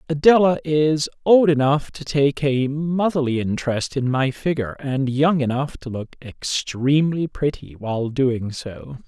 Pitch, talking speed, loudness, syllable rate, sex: 140 Hz, 145 wpm, -20 LUFS, 4.3 syllables/s, male